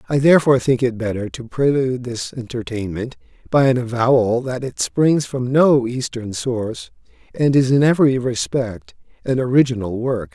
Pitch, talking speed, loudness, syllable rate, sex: 125 Hz, 155 wpm, -18 LUFS, 5.0 syllables/s, male